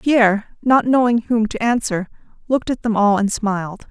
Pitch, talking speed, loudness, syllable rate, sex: 220 Hz, 185 wpm, -18 LUFS, 5.1 syllables/s, female